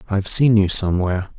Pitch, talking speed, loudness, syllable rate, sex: 100 Hz, 215 wpm, -17 LUFS, 7.2 syllables/s, male